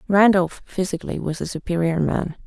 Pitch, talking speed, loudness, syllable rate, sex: 180 Hz, 145 wpm, -22 LUFS, 5.4 syllables/s, female